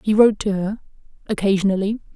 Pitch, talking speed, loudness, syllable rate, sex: 205 Hz, 110 wpm, -20 LUFS, 6.7 syllables/s, female